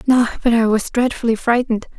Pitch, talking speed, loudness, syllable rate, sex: 235 Hz, 180 wpm, -17 LUFS, 6.1 syllables/s, female